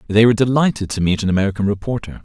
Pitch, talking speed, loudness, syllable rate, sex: 110 Hz, 215 wpm, -17 LUFS, 7.8 syllables/s, male